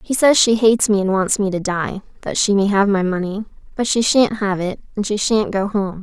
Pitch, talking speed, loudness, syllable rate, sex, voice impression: 205 Hz, 260 wpm, -17 LUFS, 5.3 syllables/s, female, feminine, young, bright, slightly soft, slightly cute, friendly, slightly sweet, slightly modest